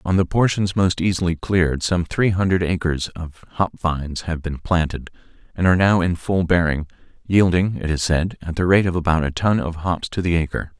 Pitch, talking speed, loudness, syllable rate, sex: 85 Hz, 210 wpm, -20 LUFS, 5.2 syllables/s, male